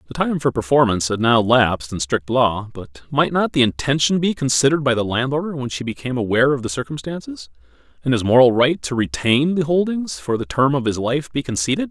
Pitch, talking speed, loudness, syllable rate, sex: 130 Hz, 215 wpm, -19 LUFS, 6.0 syllables/s, male